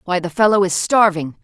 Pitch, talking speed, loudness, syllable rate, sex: 185 Hz, 210 wpm, -16 LUFS, 5.4 syllables/s, female